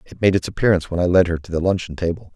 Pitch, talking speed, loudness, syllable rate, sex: 90 Hz, 305 wpm, -19 LUFS, 7.6 syllables/s, male